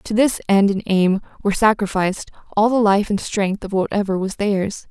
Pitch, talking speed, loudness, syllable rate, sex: 200 Hz, 195 wpm, -19 LUFS, 5.1 syllables/s, female